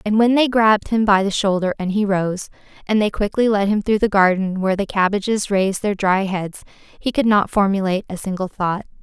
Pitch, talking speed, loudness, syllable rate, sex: 200 Hz, 220 wpm, -18 LUFS, 5.5 syllables/s, female